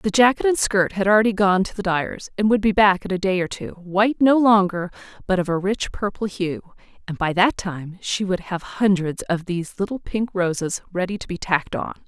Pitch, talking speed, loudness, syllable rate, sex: 195 Hz, 230 wpm, -21 LUFS, 5.3 syllables/s, female